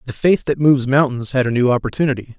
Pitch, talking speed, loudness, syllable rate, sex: 130 Hz, 225 wpm, -17 LUFS, 6.9 syllables/s, male